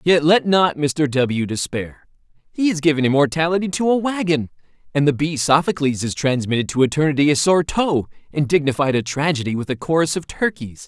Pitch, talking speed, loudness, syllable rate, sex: 150 Hz, 180 wpm, -19 LUFS, 5.5 syllables/s, male